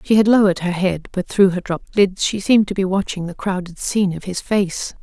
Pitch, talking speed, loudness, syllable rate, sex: 190 Hz, 250 wpm, -18 LUFS, 5.8 syllables/s, female